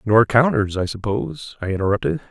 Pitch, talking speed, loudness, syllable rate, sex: 105 Hz, 155 wpm, -20 LUFS, 5.8 syllables/s, male